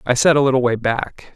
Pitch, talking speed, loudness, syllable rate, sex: 130 Hz, 265 wpm, -17 LUFS, 5.7 syllables/s, male